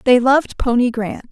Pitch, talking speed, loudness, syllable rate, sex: 245 Hz, 185 wpm, -16 LUFS, 5.3 syllables/s, female